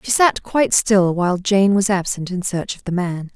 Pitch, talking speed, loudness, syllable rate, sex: 195 Hz, 235 wpm, -18 LUFS, 4.9 syllables/s, female